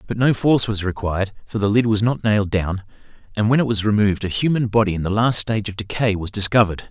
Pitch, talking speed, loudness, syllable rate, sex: 105 Hz, 245 wpm, -19 LUFS, 6.7 syllables/s, male